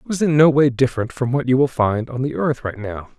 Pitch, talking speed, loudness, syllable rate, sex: 130 Hz, 300 wpm, -18 LUFS, 5.8 syllables/s, male